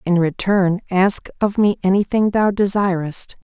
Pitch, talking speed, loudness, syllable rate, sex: 190 Hz, 135 wpm, -18 LUFS, 4.3 syllables/s, female